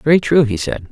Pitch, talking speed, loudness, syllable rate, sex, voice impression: 130 Hz, 265 wpm, -15 LUFS, 5.8 syllables/s, male, very masculine, very adult-like, thick, tensed, slightly weak, slightly bright, slightly hard, slightly muffled, fluent, slightly raspy, cool, very intellectual, refreshing, sincere, very calm, mature, very friendly, very reassuring, very unique, elegant, wild, sweet, lively, strict, slightly intense, slightly modest